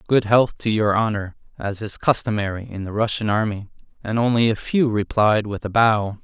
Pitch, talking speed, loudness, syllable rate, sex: 110 Hz, 190 wpm, -21 LUFS, 5.1 syllables/s, male